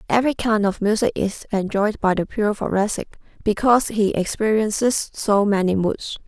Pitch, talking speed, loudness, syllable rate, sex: 210 Hz, 155 wpm, -20 LUFS, 5.1 syllables/s, female